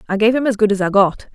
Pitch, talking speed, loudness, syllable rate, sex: 210 Hz, 355 wpm, -16 LUFS, 7.0 syllables/s, female